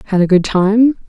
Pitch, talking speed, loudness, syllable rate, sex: 205 Hz, 220 wpm, -13 LUFS, 5.2 syllables/s, female